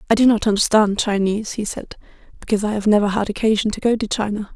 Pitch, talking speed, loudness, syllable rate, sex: 210 Hz, 225 wpm, -19 LUFS, 6.9 syllables/s, female